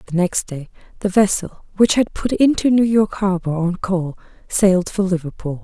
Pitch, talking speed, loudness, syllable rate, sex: 190 Hz, 180 wpm, -18 LUFS, 5.0 syllables/s, female